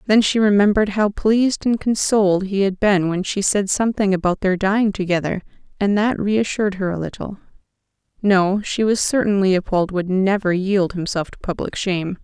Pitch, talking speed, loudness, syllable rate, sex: 200 Hz, 175 wpm, -19 LUFS, 5.3 syllables/s, female